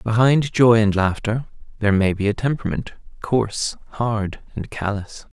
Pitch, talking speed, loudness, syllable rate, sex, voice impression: 110 Hz, 145 wpm, -20 LUFS, 4.8 syllables/s, male, very masculine, very adult-like, very thick, relaxed, slightly weak, slightly dark, slightly soft, muffled, fluent, raspy, cool, very intellectual, slightly refreshing, sincere, very calm, slightly mature, very friendly, very reassuring, very unique, elegant, wild, very sweet, slightly lively, very kind, very modest